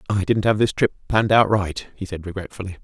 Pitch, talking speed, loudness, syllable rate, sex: 100 Hz, 235 wpm, -21 LUFS, 6.2 syllables/s, male